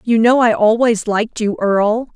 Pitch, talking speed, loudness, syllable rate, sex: 230 Hz, 195 wpm, -15 LUFS, 5.1 syllables/s, female